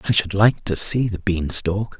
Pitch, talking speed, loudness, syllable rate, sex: 100 Hz, 240 wpm, -20 LUFS, 4.4 syllables/s, male